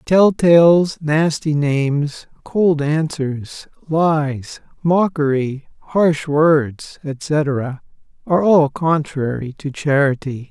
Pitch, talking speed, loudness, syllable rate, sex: 150 Hz, 90 wpm, -17 LUFS, 2.8 syllables/s, male